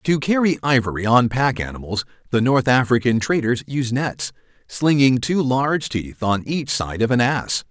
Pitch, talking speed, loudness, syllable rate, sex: 125 Hz, 170 wpm, -19 LUFS, 4.7 syllables/s, male